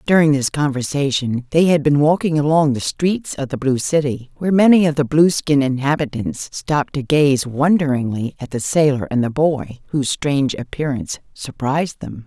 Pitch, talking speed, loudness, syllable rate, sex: 145 Hz, 170 wpm, -18 LUFS, 5.2 syllables/s, female